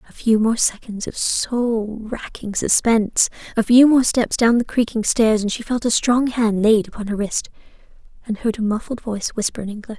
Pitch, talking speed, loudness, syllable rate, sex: 225 Hz, 205 wpm, -19 LUFS, 5.0 syllables/s, female